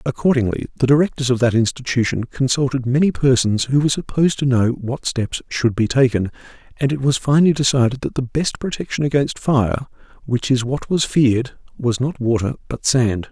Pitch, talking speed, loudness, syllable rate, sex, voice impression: 130 Hz, 170 wpm, -18 LUFS, 5.5 syllables/s, male, masculine, middle-aged, slightly relaxed, powerful, soft, slightly muffled, raspy, cool, intellectual, slightly mature, wild, slightly strict